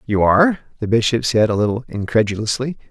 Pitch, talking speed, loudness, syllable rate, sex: 115 Hz, 165 wpm, -18 LUFS, 6.2 syllables/s, male